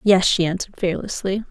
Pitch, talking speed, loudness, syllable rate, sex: 190 Hz, 160 wpm, -21 LUFS, 6.0 syllables/s, female